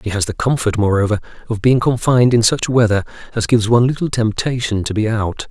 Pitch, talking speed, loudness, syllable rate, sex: 115 Hz, 205 wpm, -16 LUFS, 6.2 syllables/s, male